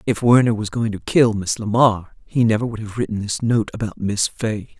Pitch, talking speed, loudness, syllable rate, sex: 110 Hz, 225 wpm, -19 LUFS, 5.2 syllables/s, female